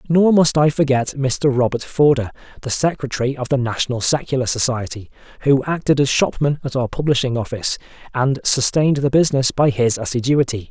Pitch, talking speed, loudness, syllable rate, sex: 135 Hz, 165 wpm, -18 LUFS, 5.7 syllables/s, male